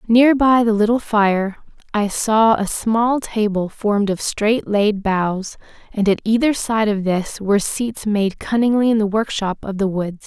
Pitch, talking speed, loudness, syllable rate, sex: 215 Hz, 180 wpm, -18 LUFS, 4.1 syllables/s, female